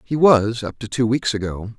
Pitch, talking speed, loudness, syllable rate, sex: 115 Hz, 235 wpm, -19 LUFS, 4.8 syllables/s, male